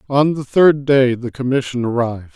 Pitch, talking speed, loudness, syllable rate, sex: 130 Hz, 180 wpm, -16 LUFS, 5.3 syllables/s, male